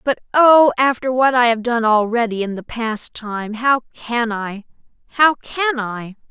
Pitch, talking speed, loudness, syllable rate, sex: 240 Hz, 170 wpm, -17 LUFS, 4.0 syllables/s, female